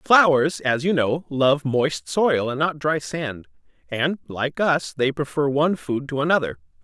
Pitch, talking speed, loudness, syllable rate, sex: 145 Hz, 175 wpm, -22 LUFS, 4.2 syllables/s, male